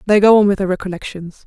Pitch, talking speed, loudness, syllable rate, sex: 195 Hz, 245 wpm, -14 LUFS, 7.0 syllables/s, female